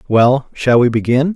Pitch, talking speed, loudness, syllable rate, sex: 130 Hz, 175 wpm, -14 LUFS, 4.4 syllables/s, male